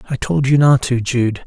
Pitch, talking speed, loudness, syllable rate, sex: 130 Hz, 245 wpm, -15 LUFS, 4.9 syllables/s, male